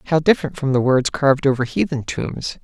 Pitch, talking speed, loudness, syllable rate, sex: 140 Hz, 205 wpm, -19 LUFS, 5.8 syllables/s, male